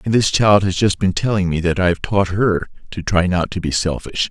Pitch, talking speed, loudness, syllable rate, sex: 95 Hz, 265 wpm, -17 LUFS, 5.2 syllables/s, male